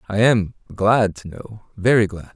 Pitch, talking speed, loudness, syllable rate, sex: 105 Hz, 180 wpm, -19 LUFS, 4.1 syllables/s, male